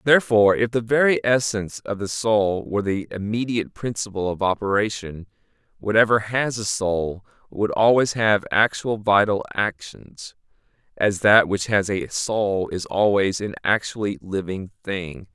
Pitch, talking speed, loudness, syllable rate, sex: 105 Hz, 140 wpm, -21 LUFS, 4.5 syllables/s, male